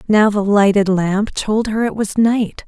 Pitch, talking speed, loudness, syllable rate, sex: 210 Hz, 200 wpm, -16 LUFS, 4.0 syllables/s, female